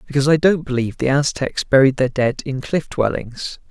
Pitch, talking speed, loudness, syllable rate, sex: 135 Hz, 195 wpm, -18 LUFS, 5.5 syllables/s, male